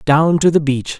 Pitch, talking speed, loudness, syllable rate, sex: 150 Hz, 240 wpm, -14 LUFS, 4.5 syllables/s, male